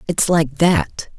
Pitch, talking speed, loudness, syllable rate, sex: 160 Hz, 150 wpm, -17 LUFS, 3.1 syllables/s, female